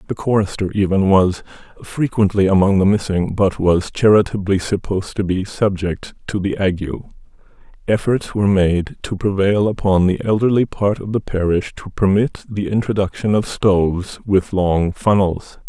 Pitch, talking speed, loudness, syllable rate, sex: 100 Hz, 150 wpm, -17 LUFS, 4.7 syllables/s, male